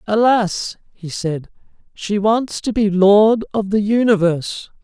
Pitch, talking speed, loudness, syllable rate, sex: 205 Hz, 135 wpm, -17 LUFS, 3.9 syllables/s, male